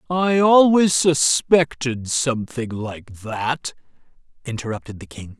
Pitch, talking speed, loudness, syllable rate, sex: 135 Hz, 100 wpm, -19 LUFS, 3.8 syllables/s, male